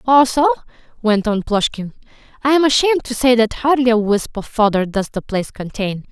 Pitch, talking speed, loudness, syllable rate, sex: 230 Hz, 185 wpm, -17 LUFS, 5.5 syllables/s, female